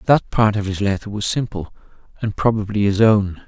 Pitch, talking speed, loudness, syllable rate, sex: 105 Hz, 190 wpm, -19 LUFS, 5.3 syllables/s, male